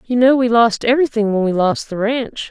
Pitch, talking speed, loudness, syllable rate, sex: 230 Hz, 240 wpm, -16 LUFS, 5.4 syllables/s, female